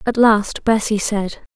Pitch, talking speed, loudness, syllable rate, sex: 215 Hz, 155 wpm, -17 LUFS, 3.7 syllables/s, female